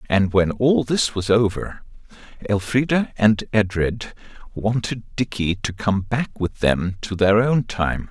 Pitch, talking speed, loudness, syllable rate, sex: 110 Hz, 150 wpm, -21 LUFS, 3.8 syllables/s, male